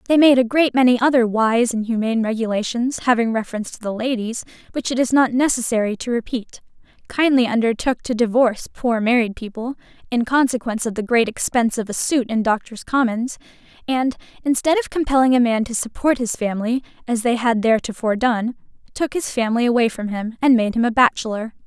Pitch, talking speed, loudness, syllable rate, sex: 235 Hz, 185 wpm, -19 LUFS, 5.9 syllables/s, female